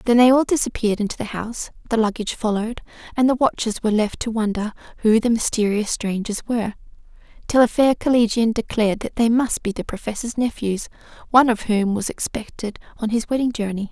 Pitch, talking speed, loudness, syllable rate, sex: 225 Hz, 185 wpm, -21 LUFS, 6.1 syllables/s, female